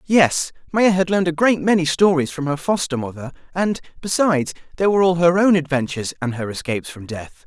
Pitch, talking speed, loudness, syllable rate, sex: 165 Hz, 200 wpm, -19 LUFS, 6.1 syllables/s, male